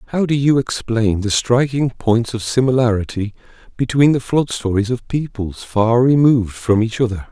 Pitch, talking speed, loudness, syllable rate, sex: 120 Hz, 165 wpm, -17 LUFS, 4.8 syllables/s, male